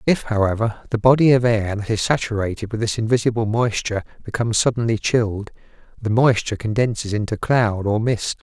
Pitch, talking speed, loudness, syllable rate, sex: 110 Hz, 160 wpm, -20 LUFS, 5.9 syllables/s, male